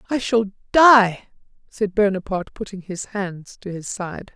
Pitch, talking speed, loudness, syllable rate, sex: 200 Hz, 150 wpm, -20 LUFS, 5.1 syllables/s, female